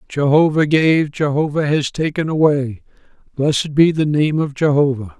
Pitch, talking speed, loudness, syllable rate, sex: 150 Hz, 140 wpm, -16 LUFS, 4.7 syllables/s, male